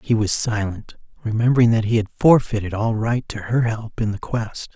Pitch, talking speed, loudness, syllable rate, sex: 110 Hz, 200 wpm, -20 LUFS, 5.2 syllables/s, male